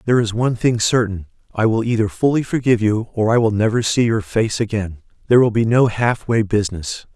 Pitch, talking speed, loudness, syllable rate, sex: 110 Hz, 210 wpm, -18 LUFS, 6.0 syllables/s, male